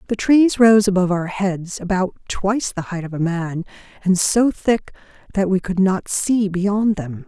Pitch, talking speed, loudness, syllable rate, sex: 195 Hz, 190 wpm, -19 LUFS, 4.6 syllables/s, female